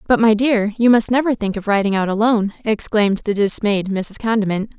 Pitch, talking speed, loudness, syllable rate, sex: 210 Hz, 200 wpm, -17 LUFS, 5.6 syllables/s, female